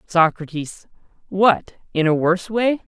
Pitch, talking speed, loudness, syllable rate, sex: 185 Hz, 120 wpm, -19 LUFS, 4.2 syllables/s, male